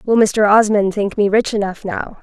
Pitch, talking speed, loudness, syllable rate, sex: 205 Hz, 215 wpm, -15 LUFS, 4.7 syllables/s, female